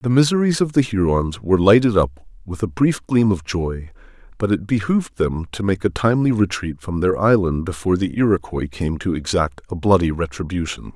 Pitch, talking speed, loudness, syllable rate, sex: 100 Hz, 190 wpm, -19 LUFS, 5.5 syllables/s, male